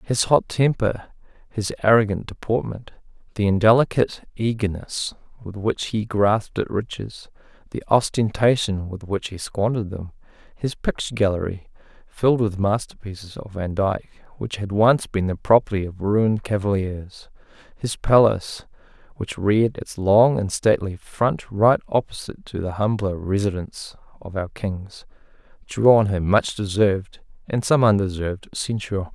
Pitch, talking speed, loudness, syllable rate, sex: 105 Hz, 135 wpm, -21 LUFS, 4.9 syllables/s, male